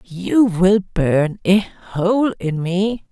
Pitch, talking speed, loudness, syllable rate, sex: 190 Hz, 135 wpm, -17 LUFS, 2.5 syllables/s, female